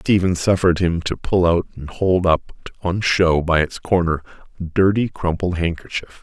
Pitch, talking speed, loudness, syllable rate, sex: 85 Hz, 175 wpm, -19 LUFS, 4.8 syllables/s, male